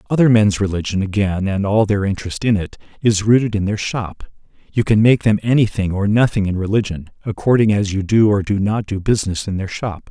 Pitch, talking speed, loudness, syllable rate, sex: 105 Hz, 215 wpm, -17 LUFS, 5.7 syllables/s, male